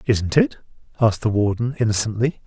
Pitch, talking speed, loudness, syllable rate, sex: 115 Hz, 145 wpm, -20 LUFS, 5.8 syllables/s, male